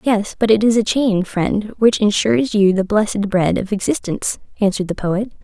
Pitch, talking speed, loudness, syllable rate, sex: 205 Hz, 200 wpm, -17 LUFS, 5.2 syllables/s, female